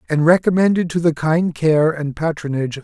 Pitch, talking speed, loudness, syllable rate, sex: 155 Hz, 190 wpm, -17 LUFS, 5.6 syllables/s, male